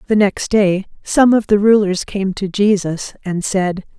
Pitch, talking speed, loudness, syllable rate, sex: 200 Hz, 180 wpm, -16 LUFS, 4.1 syllables/s, female